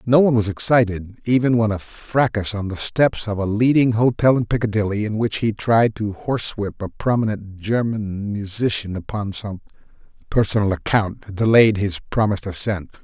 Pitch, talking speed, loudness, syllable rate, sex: 105 Hz, 165 wpm, -20 LUFS, 5.0 syllables/s, male